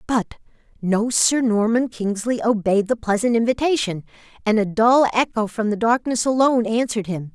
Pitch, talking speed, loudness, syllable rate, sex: 225 Hz, 155 wpm, -20 LUFS, 5.1 syllables/s, female